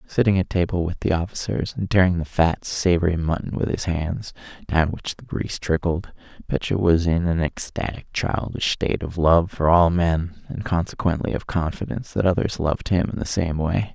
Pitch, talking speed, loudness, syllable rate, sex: 85 Hz, 190 wpm, -22 LUFS, 5.2 syllables/s, male